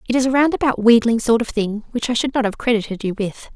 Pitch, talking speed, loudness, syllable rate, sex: 235 Hz, 270 wpm, -18 LUFS, 6.6 syllables/s, female